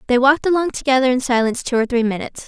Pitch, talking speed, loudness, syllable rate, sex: 255 Hz, 245 wpm, -17 LUFS, 7.9 syllables/s, female